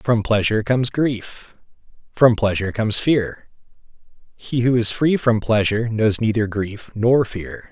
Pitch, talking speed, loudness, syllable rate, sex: 110 Hz, 150 wpm, -19 LUFS, 4.5 syllables/s, male